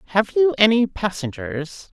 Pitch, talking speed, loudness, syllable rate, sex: 200 Hz, 120 wpm, -20 LUFS, 4.4 syllables/s, female